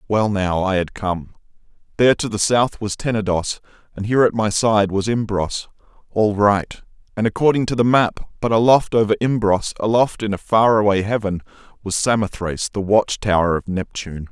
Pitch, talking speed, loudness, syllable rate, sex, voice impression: 105 Hz, 175 wpm, -19 LUFS, 5.3 syllables/s, male, masculine, adult-like, slightly clear, cool, intellectual, slightly refreshing